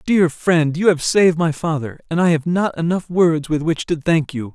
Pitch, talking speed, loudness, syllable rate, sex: 165 Hz, 235 wpm, -18 LUFS, 4.9 syllables/s, male